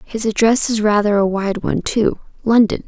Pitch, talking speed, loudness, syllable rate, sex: 215 Hz, 165 wpm, -16 LUFS, 5.1 syllables/s, female